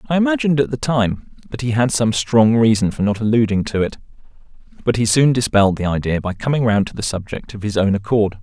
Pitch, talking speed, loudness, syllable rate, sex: 115 Hz, 230 wpm, -17 LUFS, 6.1 syllables/s, male